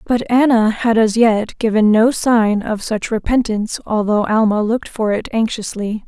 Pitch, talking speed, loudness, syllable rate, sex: 220 Hz, 170 wpm, -16 LUFS, 4.6 syllables/s, female